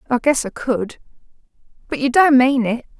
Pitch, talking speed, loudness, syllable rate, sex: 255 Hz, 160 wpm, -17 LUFS, 5.0 syllables/s, female